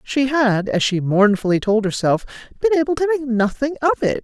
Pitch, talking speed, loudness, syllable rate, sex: 240 Hz, 200 wpm, -18 LUFS, 5.3 syllables/s, female